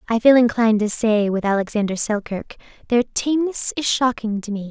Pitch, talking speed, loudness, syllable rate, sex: 225 Hz, 180 wpm, -19 LUFS, 5.6 syllables/s, female